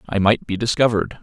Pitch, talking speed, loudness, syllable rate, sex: 110 Hz, 195 wpm, -19 LUFS, 6.5 syllables/s, male